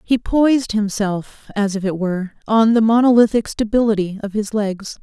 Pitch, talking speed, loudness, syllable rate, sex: 215 Hz, 165 wpm, -17 LUFS, 4.9 syllables/s, female